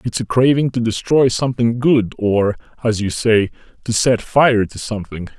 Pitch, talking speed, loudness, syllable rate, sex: 115 Hz, 180 wpm, -17 LUFS, 4.8 syllables/s, male